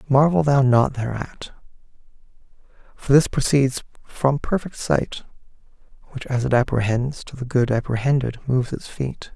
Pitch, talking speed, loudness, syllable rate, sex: 130 Hz, 135 wpm, -21 LUFS, 4.6 syllables/s, male